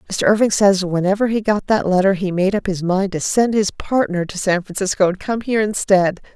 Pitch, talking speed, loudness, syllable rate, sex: 195 Hz, 225 wpm, -18 LUFS, 5.4 syllables/s, female